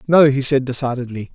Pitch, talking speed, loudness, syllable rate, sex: 130 Hz, 180 wpm, -17 LUFS, 6.0 syllables/s, male